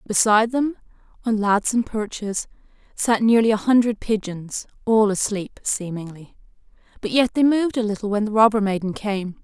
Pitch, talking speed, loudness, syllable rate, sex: 215 Hz, 160 wpm, -21 LUFS, 5.0 syllables/s, female